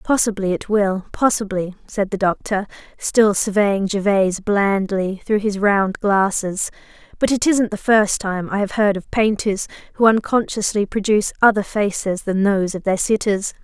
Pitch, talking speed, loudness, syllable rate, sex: 205 Hz, 155 wpm, -19 LUFS, 4.6 syllables/s, female